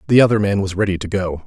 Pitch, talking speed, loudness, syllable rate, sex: 100 Hz, 285 wpm, -17 LUFS, 7.1 syllables/s, male